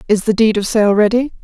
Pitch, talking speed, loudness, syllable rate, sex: 215 Hz, 250 wpm, -14 LUFS, 6.0 syllables/s, female